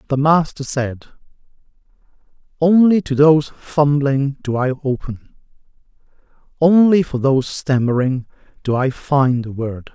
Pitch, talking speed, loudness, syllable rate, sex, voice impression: 140 Hz, 115 wpm, -17 LUFS, 4.3 syllables/s, male, masculine, adult-like, tensed, powerful, soft, clear, halting, sincere, calm, friendly, reassuring, unique, slightly wild, slightly lively, slightly kind